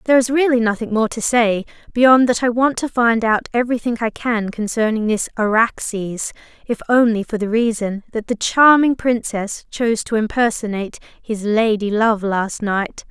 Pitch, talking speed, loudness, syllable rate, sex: 225 Hz, 170 wpm, -18 LUFS, 4.9 syllables/s, female